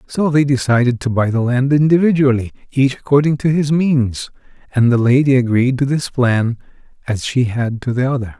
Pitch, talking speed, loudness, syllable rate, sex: 130 Hz, 185 wpm, -16 LUFS, 5.2 syllables/s, male